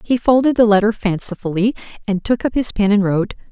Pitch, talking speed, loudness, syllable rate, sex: 215 Hz, 205 wpm, -17 LUFS, 6.1 syllables/s, female